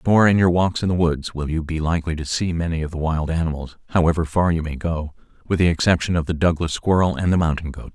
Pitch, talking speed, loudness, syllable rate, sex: 85 Hz, 255 wpm, -21 LUFS, 6.2 syllables/s, male